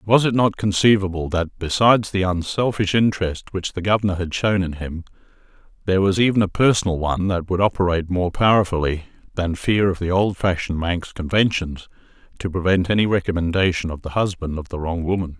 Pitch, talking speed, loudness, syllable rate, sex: 95 Hz, 180 wpm, -20 LUFS, 6.0 syllables/s, male